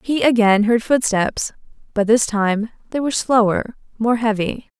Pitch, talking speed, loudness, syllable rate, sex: 225 Hz, 150 wpm, -18 LUFS, 4.5 syllables/s, female